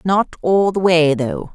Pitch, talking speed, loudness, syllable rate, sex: 165 Hz, 195 wpm, -16 LUFS, 3.6 syllables/s, female